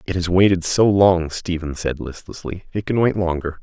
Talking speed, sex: 200 wpm, male